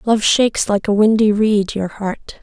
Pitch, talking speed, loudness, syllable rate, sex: 210 Hz, 200 wpm, -16 LUFS, 4.4 syllables/s, female